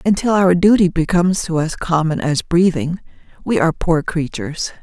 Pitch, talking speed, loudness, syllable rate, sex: 170 Hz, 160 wpm, -17 LUFS, 5.2 syllables/s, female